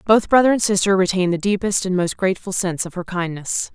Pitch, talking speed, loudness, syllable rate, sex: 190 Hz, 225 wpm, -19 LUFS, 6.4 syllables/s, female